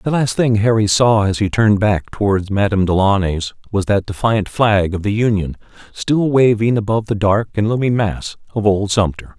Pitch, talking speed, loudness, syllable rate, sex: 105 Hz, 190 wpm, -16 LUFS, 5.1 syllables/s, male